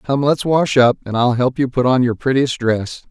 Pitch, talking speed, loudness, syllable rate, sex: 130 Hz, 250 wpm, -16 LUFS, 4.9 syllables/s, male